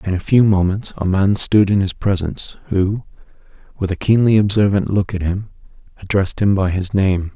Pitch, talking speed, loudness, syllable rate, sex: 95 Hz, 190 wpm, -17 LUFS, 5.2 syllables/s, male